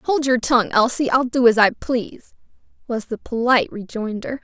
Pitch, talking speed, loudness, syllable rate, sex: 240 Hz, 175 wpm, -19 LUFS, 5.2 syllables/s, female